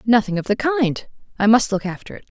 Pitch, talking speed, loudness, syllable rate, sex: 210 Hz, 200 wpm, -19 LUFS, 5.7 syllables/s, female